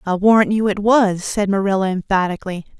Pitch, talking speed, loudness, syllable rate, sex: 200 Hz, 170 wpm, -17 LUFS, 5.9 syllables/s, female